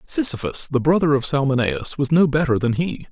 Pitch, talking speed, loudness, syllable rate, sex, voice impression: 135 Hz, 190 wpm, -19 LUFS, 5.5 syllables/s, male, masculine, slightly old, thick, tensed, hard, slightly muffled, slightly raspy, intellectual, calm, mature, reassuring, wild, lively, slightly strict